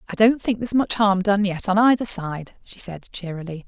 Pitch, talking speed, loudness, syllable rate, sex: 200 Hz, 230 wpm, -21 LUFS, 5.3 syllables/s, female